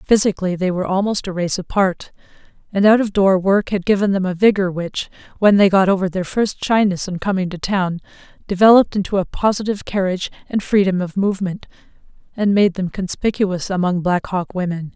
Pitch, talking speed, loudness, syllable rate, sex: 190 Hz, 185 wpm, -18 LUFS, 5.8 syllables/s, female